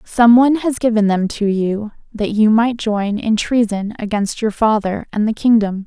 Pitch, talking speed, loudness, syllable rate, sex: 215 Hz, 195 wpm, -16 LUFS, 4.6 syllables/s, female